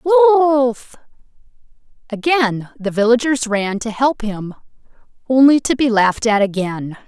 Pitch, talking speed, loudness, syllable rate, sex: 240 Hz, 120 wpm, -16 LUFS, 3.9 syllables/s, female